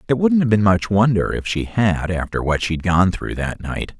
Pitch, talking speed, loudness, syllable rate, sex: 100 Hz, 240 wpm, -19 LUFS, 4.7 syllables/s, male